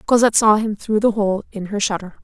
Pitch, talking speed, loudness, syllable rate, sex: 210 Hz, 240 wpm, -18 LUFS, 6.1 syllables/s, female